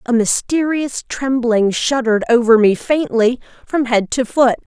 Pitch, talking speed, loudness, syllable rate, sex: 245 Hz, 140 wpm, -16 LUFS, 4.3 syllables/s, female